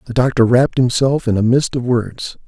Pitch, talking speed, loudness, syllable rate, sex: 120 Hz, 220 wpm, -15 LUFS, 5.4 syllables/s, male